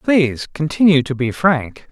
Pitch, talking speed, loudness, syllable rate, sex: 150 Hz, 155 wpm, -16 LUFS, 4.6 syllables/s, male